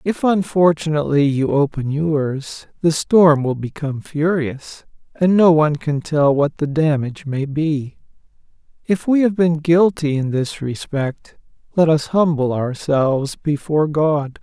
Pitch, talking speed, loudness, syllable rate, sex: 150 Hz, 140 wpm, -18 LUFS, 4.2 syllables/s, male